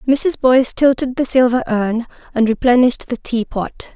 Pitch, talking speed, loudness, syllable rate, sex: 245 Hz, 165 wpm, -16 LUFS, 5.0 syllables/s, female